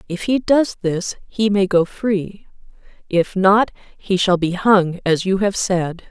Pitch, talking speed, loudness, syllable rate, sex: 190 Hz, 175 wpm, -18 LUFS, 3.7 syllables/s, female